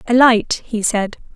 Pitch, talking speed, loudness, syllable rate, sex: 225 Hz, 180 wpm, -16 LUFS, 4.0 syllables/s, female